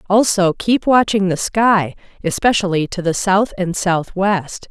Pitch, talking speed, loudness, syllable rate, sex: 190 Hz, 140 wpm, -16 LUFS, 4.1 syllables/s, female